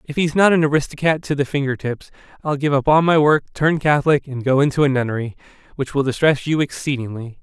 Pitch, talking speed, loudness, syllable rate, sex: 140 Hz, 210 wpm, -18 LUFS, 6.2 syllables/s, male